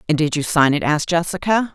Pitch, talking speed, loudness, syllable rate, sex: 160 Hz, 240 wpm, -18 LUFS, 6.4 syllables/s, female